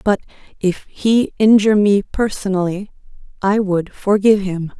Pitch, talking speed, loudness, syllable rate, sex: 200 Hz, 125 wpm, -16 LUFS, 4.6 syllables/s, female